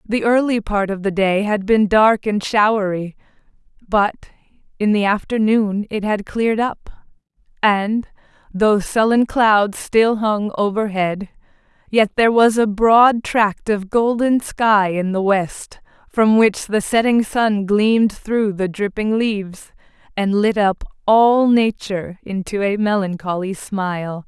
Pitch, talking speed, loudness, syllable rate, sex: 210 Hz, 140 wpm, -17 LUFS, 4.0 syllables/s, female